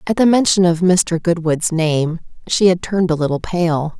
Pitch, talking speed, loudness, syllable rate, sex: 170 Hz, 195 wpm, -16 LUFS, 4.8 syllables/s, female